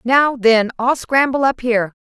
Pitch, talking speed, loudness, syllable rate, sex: 245 Hz, 175 wpm, -16 LUFS, 4.5 syllables/s, female